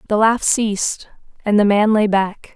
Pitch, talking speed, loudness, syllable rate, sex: 210 Hz, 190 wpm, -16 LUFS, 5.0 syllables/s, female